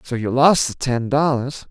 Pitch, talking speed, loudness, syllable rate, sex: 135 Hz, 210 wpm, -18 LUFS, 4.4 syllables/s, male